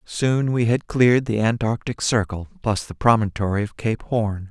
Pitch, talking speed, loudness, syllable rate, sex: 110 Hz, 175 wpm, -21 LUFS, 4.7 syllables/s, male